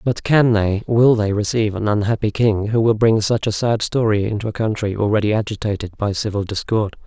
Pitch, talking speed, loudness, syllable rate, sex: 110 Hz, 205 wpm, -18 LUFS, 5.6 syllables/s, male